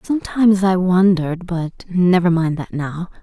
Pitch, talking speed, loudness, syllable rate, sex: 180 Hz, 130 wpm, -17 LUFS, 4.6 syllables/s, female